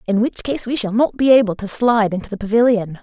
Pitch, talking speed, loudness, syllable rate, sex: 225 Hz, 260 wpm, -17 LUFS, 6.3 syllables/s, female